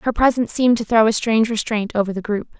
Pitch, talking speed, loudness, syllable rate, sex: 220 Hz, 255 wpm, -18 LUFS, 6.8 syllables/s, female